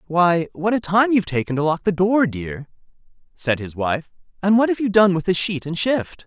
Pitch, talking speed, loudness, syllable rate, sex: 175 Hz, 230 wpm, -20 LUFS, 5.1 syllables/s, male